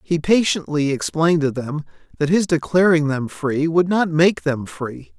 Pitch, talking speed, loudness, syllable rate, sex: 160 Hz, 175 wpm, -19 LUFS, 4.4 syllables/s, male